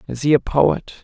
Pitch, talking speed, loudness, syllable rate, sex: 120 Hz, 230 wpm, -17 LUFS, 4.6 syllables/s, male